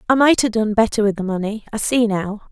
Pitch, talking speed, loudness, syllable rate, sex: 215 Hz, 260 wpm, -18 LUFS, 6.0 syllables/s, female